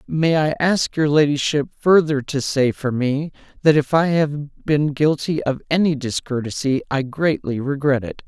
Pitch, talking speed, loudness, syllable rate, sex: 145 Hz, 165 wpm, -19 LUFS, 4.4 syllables/s, male